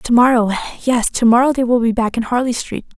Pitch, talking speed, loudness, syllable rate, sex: 240 Hz, 220 wpm, -15 LUFS, 5.8 syllables/s, female